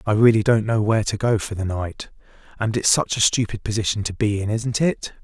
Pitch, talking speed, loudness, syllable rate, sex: 105 Hz, 240 wpm, -21 LUFS, 5.6 syllables/s, male